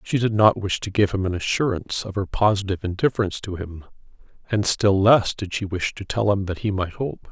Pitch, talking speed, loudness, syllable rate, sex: 100 Hz, 220 wpm, -22 LUFS, 5.8 syllables/s, male